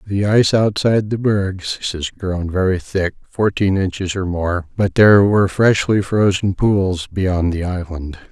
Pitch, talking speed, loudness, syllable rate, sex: 95 Hz, 160 wpm, -17 LUFS, 4.2 syllables/s, male